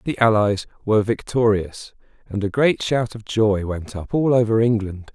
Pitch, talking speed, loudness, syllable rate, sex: 110 Hz, 175 wpm, -20 LUFS, 4.6 syllables/s, male